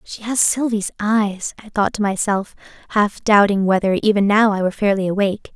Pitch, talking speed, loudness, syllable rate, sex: 205 Hz, 185 wpm, -18 LUFS, 5.3 syllables/s, female